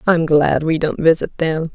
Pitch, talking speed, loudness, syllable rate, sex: 160 Hz, 205 wpm, -16 LUFS, 4.4 syllables/s, female